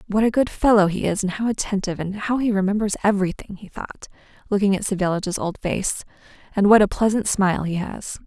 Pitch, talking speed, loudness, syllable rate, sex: 200 Hz, 205 wpm, -21 LUFS, 6.2 syllables/s, female